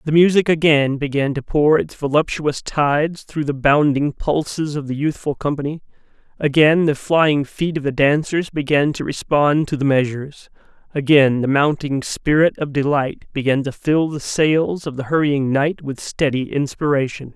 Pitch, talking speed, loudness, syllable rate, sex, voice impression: 145 Hz, 165 wpm, -18 LUFS, 4.6 syllables/s, male, masculine, slightly old, muffled, slightly intellectual, slightly calm, elegant